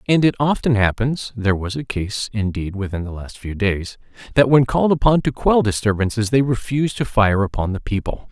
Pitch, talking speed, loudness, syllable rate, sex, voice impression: 115 Hz, 200 wpm, -19 LUFS, 4.2 syllables/s, male, masculine, very adult-like, slightly thick, slightly fluent, cool, slightly refreshing, sincere, friendly